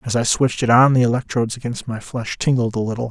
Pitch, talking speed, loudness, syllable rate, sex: 120 Hz, 250 wpm, -19 LUFS, 6.7 syllables/s, male